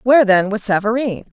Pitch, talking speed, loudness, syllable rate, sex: 220 Hz, 175 wpm, -16 LUFS, 5.7 syllables/s, female